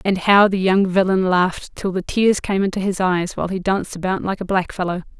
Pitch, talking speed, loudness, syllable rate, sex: 190 Hz, 230 wpm, -19 LUFS, 5.7 syllables/s, female